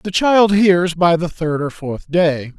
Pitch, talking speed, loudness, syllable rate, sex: 170 Hz, 210 wpm, -16 LUFS, 3.6 syllables/s, male